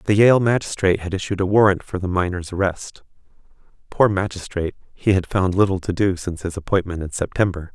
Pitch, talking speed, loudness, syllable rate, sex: 95 Hz, 180 wpm, -20 LUFS, 6.0 syllables/s, male